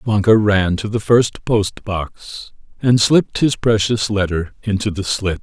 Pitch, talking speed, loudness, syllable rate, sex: 105 Hz, 165 wpm, -17 LUFS, 4.1 syllables/s, male